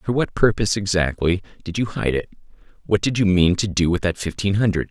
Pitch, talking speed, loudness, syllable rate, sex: 95 Hz, 220 wpm, -20 LUFS, 6.0 syllables/s, male